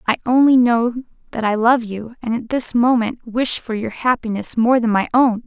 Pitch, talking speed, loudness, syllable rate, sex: 235 Hz, 210 wpm, -17 LUFS, 4.9 syllables/s, female